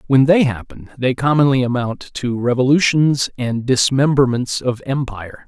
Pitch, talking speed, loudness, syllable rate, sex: 130 Hz, 130 wpm, -17 LUFS, 4.7 syllables/s, male